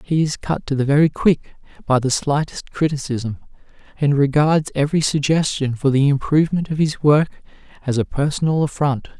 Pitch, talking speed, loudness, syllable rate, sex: 145 Hz, 165 wpm, -19 LUFS, 5.2 syllables/s, male